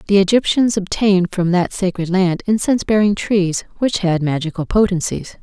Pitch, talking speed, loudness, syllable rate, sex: 190 Hz, 155 wpm, -17 LUFS, 5.3 syllables/s, female